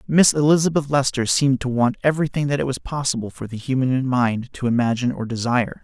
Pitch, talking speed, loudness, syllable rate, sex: 130 Hz, 195 wpm, -20 LUFS, 6.2 syllables/s, male